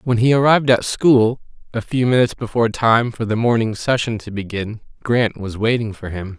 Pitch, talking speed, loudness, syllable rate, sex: 115 Hz, 195 wpm, -18 LUFS, 5.4 syllables/s, male